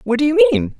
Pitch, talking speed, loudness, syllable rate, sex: 205 Hz, 300 wpm, -14 LUFS, 7.3 syllables/s, female